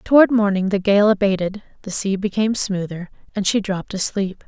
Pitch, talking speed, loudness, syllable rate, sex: 200 Hz, 175 wpm, -19 LUFS, 5.5 syllables/s, female